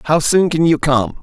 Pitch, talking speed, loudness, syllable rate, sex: 155 Hz, 245 wpm, -14 LUFS, 4.9 syllables/s, male